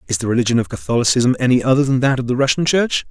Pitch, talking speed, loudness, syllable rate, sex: 125 Hz, 250 wpm, -16 LUFS, 7.3 syllables/s, male